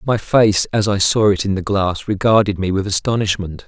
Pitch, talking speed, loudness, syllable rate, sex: 100 Hz, 215 wpm, -16 LUFS, 5.1 syllables/s, male